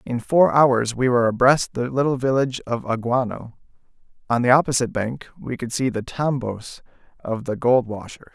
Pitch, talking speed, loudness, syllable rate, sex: 125 Hz, 175 wpm, -21 LUFS, 5.3 syllables/s, male